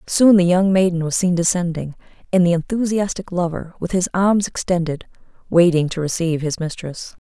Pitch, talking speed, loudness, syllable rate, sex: 175 Hz, 165 wpm, -18 LUFS, 5.3 syllables/s, female